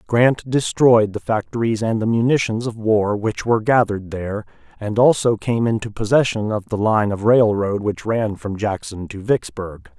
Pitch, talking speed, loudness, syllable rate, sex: 110 Hz, 175 wpm, -19 LUFS, 4.8 syllables/s, male